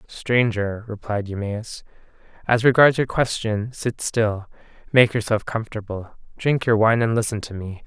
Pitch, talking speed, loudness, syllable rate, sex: 110 Hz, 145 wpm, -21 LUFS, 4.5 syllables/s, male